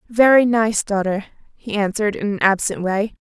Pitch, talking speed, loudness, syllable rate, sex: 215 Hz, 165 wpm, -18 LUFS, 5.2 syllables/s, female